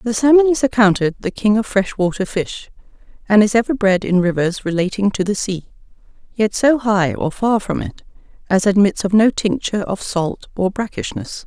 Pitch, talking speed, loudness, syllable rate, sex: 210 Hz, 185 wpm, -17 LUFS, 5.1 syllables/s, female